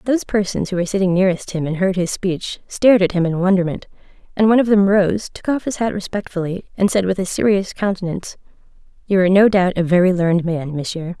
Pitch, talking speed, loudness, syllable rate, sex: 190 Hz, 220 wpm, -18 LUFS, 6.4 syllables/s, female